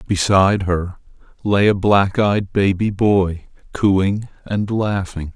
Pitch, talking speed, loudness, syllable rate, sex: 100 Hz, 125 wpm, -18 LUFS, 3.5 syllables/s, male